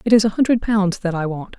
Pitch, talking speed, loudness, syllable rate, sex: 200 Hz, 300 wpm, -19 LUFS, 6.0 syllables/s, female